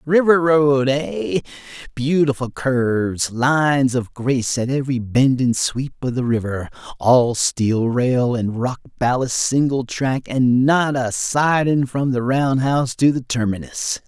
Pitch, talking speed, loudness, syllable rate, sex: 130 Hz, 150 wpm, -19 LUFS, 3.9 syllables/s, male